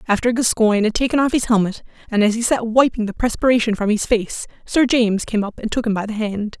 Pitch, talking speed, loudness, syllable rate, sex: 225 Hz, 245 wpm, -18 LUFS, 6.2 syllables/s, female